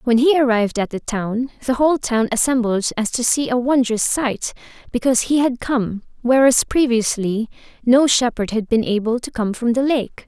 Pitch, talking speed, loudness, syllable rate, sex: 240 Hz, 185 wpm, -18 LUFS, 5.1 syllables/s, female